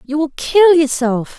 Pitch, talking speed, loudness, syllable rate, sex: 295 Hz, 175 wpm, -14 LUFS, 4.0 syllables/s, female